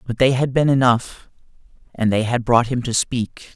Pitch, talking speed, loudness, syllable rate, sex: 120 Hz, 205 wpm, -19 LUFS, 4.7 syllables/s, male